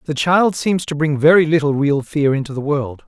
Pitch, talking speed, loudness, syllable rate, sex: 150 Hz, 235 wpm, -16 LUFS, 5.2 syllables/s, male